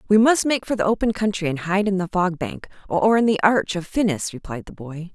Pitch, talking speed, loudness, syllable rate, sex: 195 Hz, 255 wpm, -21 LUFS, 5.6 syllables/s, female